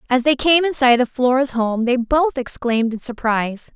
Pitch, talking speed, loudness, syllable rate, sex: 255 Hz, 210 wpm, -18 LUFS, 5.1 syllables/s, female